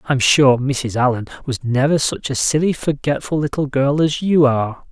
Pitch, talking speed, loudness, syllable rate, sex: 140 Hz, 185 wpm, -17 LUFS, 4.9 syllables/s, male